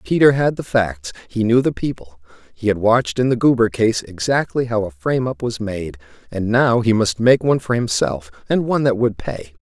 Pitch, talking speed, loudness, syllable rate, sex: 115 Hz, 220 wpm, -18 LUFS, 5.3 syllables/s, male